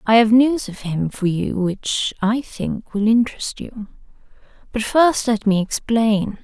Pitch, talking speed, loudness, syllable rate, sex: 220 Hz, 170 wpm, -19 LUFS, 3.9 syllables/s, female